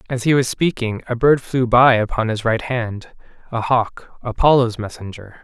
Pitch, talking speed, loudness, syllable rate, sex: 120 Hz, 165 wpm, -18 LUFS, 4.6 syllables/s, male